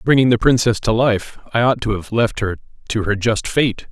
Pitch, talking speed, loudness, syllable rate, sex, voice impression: 115 Hz, 230 wpm, -18 LUFS, 5.1 syllables/s, male, very masculine, slightly old, very thick, tensed, very powerful, slightly dark, hard, slightly muffled, fluent, raspy, cool, intellectual, very sincere, very calm, friendly, reassuring, very unique, slightly elegant, wild, sweet, slightly strict, slightly intense, modest